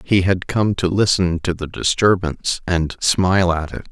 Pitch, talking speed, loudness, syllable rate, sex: 90 Hz, 185 wpm, -18 LUFS, 4.6 syllables/s, male